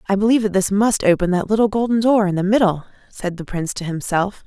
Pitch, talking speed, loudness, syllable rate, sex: 200 Hz, 240 wpm, -18 LUFS, 6.4 syllables/s, female